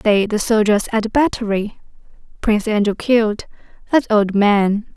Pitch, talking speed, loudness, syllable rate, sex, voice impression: 215 Hz, 145 wpm, -17 LUFS, 4.8 syllables/s, female, feminine, slightly young, tensed, powerful, bright, soft, slightly raspy, friendly, lively, kind, light